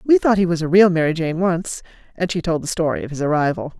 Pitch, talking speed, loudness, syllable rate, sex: 170 Hz, 270 wpm, -19 LUFS, 6.3 syllables/s, female